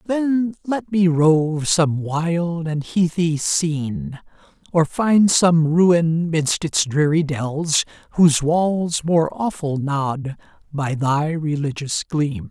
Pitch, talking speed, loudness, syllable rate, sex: 160 Hz, 125 wpm, -19 LUFS, 3.0 syllables/s, male